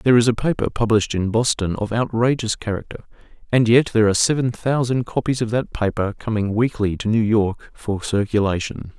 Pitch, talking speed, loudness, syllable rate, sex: 110 Hz, 180 wpm, -20 LUFS, 5.6 syllables/s, male